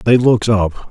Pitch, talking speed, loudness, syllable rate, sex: 110 Hz, 200 wpm, -14 LUFS, 6.5 syllables/s, male